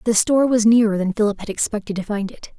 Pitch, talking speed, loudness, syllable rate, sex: 215 Hz, 255 wpm, -19 LUFS, 6.5 syllables/s, female